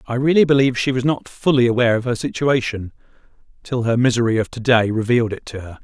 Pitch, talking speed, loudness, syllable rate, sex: 120 Hz, 215 wpm, -18 LUFS, 6.6 syllables/s, male